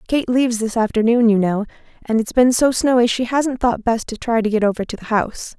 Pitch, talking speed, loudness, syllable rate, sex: 230 Hz, 245 wpm, -18 LUFS, 5.8 syllables/s, female